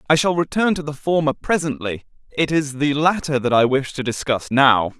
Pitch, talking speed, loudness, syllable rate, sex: 145 Hz, 205 wpm, -19 LUFS, 5.3 syllables/s, male